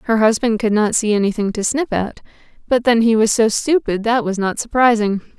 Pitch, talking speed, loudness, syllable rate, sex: 220 Hz, 210 wpm, -17 LUFS, 5.4 syllables/s, female